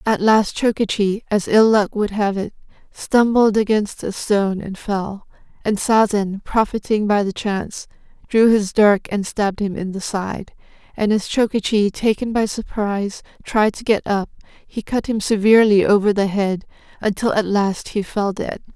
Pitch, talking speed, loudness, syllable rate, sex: 205 Hz, 170 wpm, -18 LUFS, 4.5 syllables/s, female